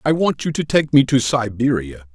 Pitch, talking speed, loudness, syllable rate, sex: 125 Hz, 225 wpm, -18 LUFS, 5.0 syllables/s, male